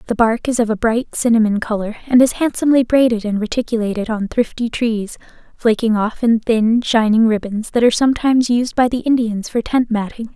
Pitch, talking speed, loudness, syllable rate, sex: 230 Hz, 190 wpm, -16 LUFS, 5.5 syllables/s, female